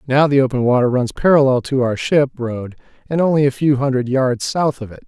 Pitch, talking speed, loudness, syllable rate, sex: 130 Hz, 225 wpm, -16 LUFS, 5.6 syllables/s, male